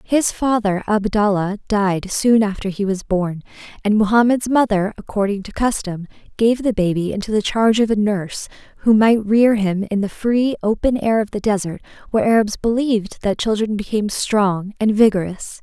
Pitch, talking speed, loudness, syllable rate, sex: 210 Hz, 175 wpm, -18 LUFS, 5.1 syllables/s, female